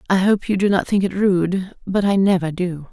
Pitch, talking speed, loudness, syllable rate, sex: 190 Hz, 225 wpm, -19 LUFS, 4.9 syllables/s, female